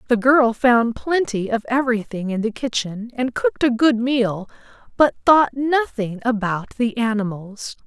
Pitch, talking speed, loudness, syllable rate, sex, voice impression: 240 Hz, 155 wpm, -19 LUFS, 4.5 syllables/s, female, very feminine, very adult-like, middle-aged, slightly tensed, dark, hard, clear, very fluent, slightly cool, intellectual, refreshing, sincere, calm, friendly, reassuring, slightly unique, elegant, slightly wild, slightly sweet, slightly lively, slightly strict, sharp